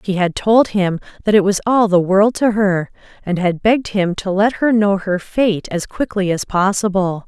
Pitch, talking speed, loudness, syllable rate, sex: 195 Hz, 215 wpm, -16 LUFS, 4.6 syllables/s, female